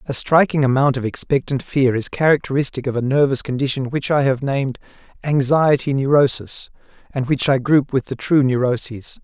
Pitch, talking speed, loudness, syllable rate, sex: 135 Hz, 170 wpm, -18 LUFS, 5.3 syllables/s, male